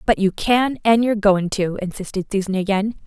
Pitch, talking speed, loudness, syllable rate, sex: 205 Hz, 195 wpm, -19 LUFS, 5.4 syllables/s, female